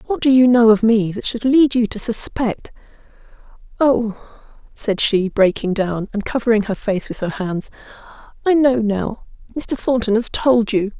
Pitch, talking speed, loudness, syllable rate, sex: 225 Hz, 165 wpm, -17 LUFS, 4.5 syllables/s, female